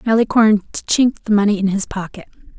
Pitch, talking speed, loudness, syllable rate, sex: 210 Hz, 165 wpm, -16 LUFS, 6.6 syllables/s, female